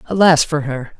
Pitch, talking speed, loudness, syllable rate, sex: 150 Hz, 180 wpm, -15 LUFS, 4.7 syllables/s, female